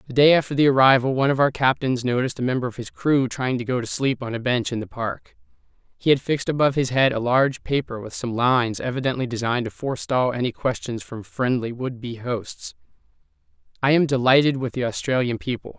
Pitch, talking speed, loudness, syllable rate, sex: 125 Hz, 215 wpm, -22 LUFS, 6.1 syllables/s, male